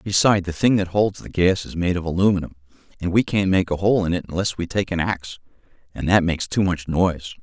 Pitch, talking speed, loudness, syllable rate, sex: 90 Hz, 245 wpm, -21 LUFS, 6.2 syllables/s, male